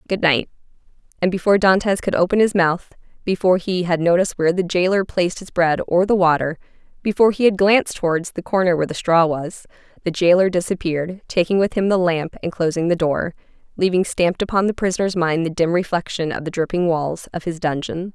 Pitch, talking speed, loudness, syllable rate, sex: 175 Hz, 190 wpm, -19 LUFS, 6.1 syllables/s, female